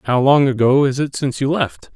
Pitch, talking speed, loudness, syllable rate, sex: 135 Hz, 245 wpm, -16 LUFS, 5.6 syllables/s, male